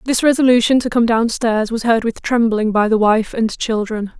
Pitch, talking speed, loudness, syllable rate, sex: 230 Hz, 200 wpm, -16 LUFS, 5.0 syllables/s, female